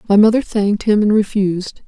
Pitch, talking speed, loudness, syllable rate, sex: 205 Hz, 190 wpm, -15 LUFS, 6.0 syllables/s, female